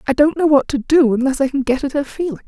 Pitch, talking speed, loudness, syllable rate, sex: 280 Hz, 315 wpm, -16 LUFS, 6.6 syllables/s, female